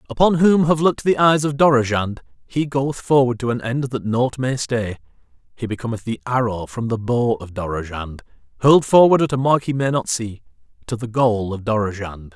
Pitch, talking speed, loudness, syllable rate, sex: 120 Hz, 195 wpm, -19 LUFS, 5.3 syllables/s, male